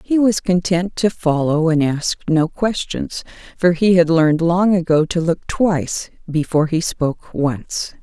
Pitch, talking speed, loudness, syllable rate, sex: 170 Hz, 165 wpm, -18 LUFS, 4.3 syllables/s, female